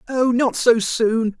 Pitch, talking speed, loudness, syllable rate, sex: 235 Hz, 170 wpm, -18 LUFS, 3.3 syllables/s, male